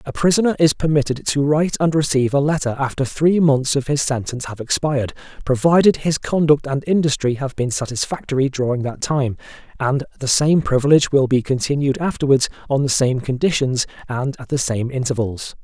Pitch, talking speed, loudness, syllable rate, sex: 140 Hz, 175 wpm, -18 LUFS, 5.7 syllables/s, male